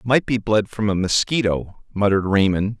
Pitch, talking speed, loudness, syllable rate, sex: 105 Hz, 170 wpm, -20 LUFS, 5.0 syllables/s, male